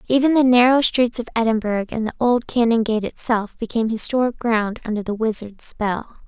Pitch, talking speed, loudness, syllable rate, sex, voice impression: 230 Hz, 170 wpm, -20 LUFS, 5.5 syllables/s, female, feminine, young, soft, cute, slightly refreshing, friendly, slightly sweet, kind